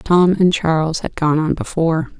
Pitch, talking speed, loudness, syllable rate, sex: 165 Hz, 190 wpm, -17 LUFS, 4.7 syllables/s, female